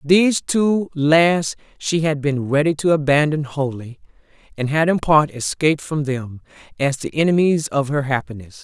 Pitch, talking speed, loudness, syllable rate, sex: 150 Hz, 160 wpm, -19 LUFS, 4.6 syllables/s, female